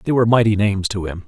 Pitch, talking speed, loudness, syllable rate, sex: 105 Hz, 280 wpm, -17 LUFS, 8.0 syllables/s, male